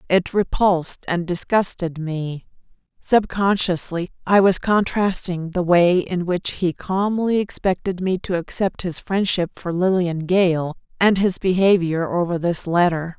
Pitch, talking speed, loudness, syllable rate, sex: 180 Hz, 135 wpm, -20 LUFS, 4.1 syllables/s, female